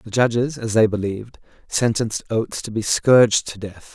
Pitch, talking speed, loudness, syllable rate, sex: 110 Hz, 185 wpm, -19 LUFS, 5.3 syllables/s, male